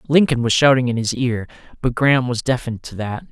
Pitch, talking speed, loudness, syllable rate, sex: 125 Hz, 215 wpm, -18 LUFS, 6.2 syllables/s, male